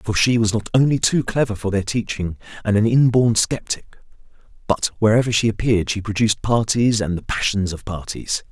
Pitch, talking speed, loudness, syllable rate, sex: 110 Hz, 185 wpm, -19 LUFS, 5.5 syllables/s, male